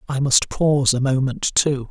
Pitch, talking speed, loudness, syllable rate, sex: 135 Hz, 190 wpm, -18 LUFS, 4.6 syllables/s, male